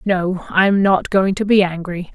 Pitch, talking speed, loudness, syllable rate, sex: 185 Hz, 225 wpm, -16 LUFS, 4.6 syllables/s, female